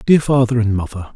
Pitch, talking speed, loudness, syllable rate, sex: 115 Hz, 210 wpm, -16 LUFS, 5.8 syllables/s, male